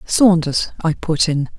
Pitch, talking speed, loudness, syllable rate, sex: 170 Hz, 150 wpm, -17 LUFS, 3.7 syllables/s, female